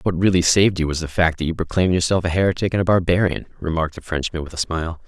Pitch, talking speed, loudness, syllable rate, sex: 85 Hz, 260 wpm, -20 LUFS, 7.3 syllables/s, male